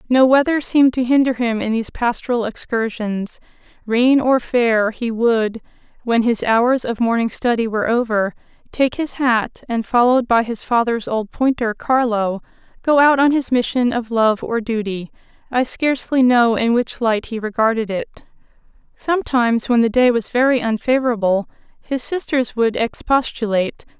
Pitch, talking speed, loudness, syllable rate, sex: 235 Hz, 155 wpm, -18 LUFS, 4.8 syllables/s, female